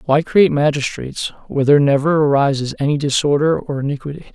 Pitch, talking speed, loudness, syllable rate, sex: 145 Hz, 150 wpm, -16 LUFS, 6.6 syllables/s, male